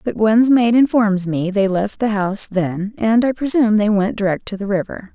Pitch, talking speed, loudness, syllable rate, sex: 210 Hz, 220 wpm, -17 LUFS, 5.0 syllables/s, female